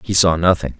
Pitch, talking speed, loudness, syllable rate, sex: 85 Hz, 230 wpm, -15 LUFS, 5.9 syllables/s, male